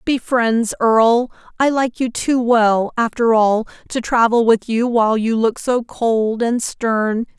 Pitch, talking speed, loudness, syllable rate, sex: 230 Hz, 170 wpm, -17 LUFS, 3.8 syllables/s, female